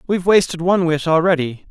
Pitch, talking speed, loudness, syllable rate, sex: 170 Hz, 175 wpm, -16 LUFS, 6.5 syllables/s, male